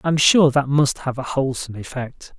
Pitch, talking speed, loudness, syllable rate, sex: 135 Hz, 200 wpm, -19 LUFS, 5.3 syllables/s, male